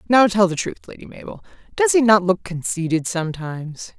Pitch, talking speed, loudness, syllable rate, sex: 190 Hz, 180 wpm, -19 LUFS, 5.7 syllables/s, female